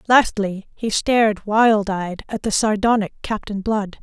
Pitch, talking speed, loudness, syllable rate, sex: 210 Hz, 150 wpm, -19 LUFS, 4.2 syllables/s, female